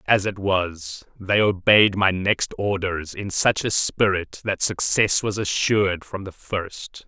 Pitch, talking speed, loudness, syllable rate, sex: 95 Hz, 160 wpm, -21 LUFS, 3.7 syllables/s, male